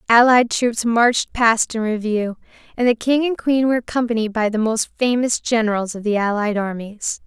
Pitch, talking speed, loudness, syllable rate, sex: 230 Hz, 180 wpm, -18 LUFS, 5.1 syllables/s, female